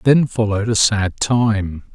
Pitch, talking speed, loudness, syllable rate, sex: 110 Hz, 155 wpm, -17 LUFS, 4.1 syllables/s, male